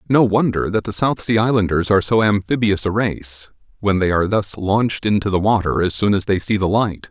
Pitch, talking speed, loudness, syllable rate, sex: 100 Hz, 230 wpm, -18 LUFS, 5.6 syllables/s, male